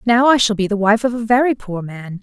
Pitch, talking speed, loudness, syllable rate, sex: 220 Hz, 295 wpm, -16 LUFS, 5.6 syllables/s, female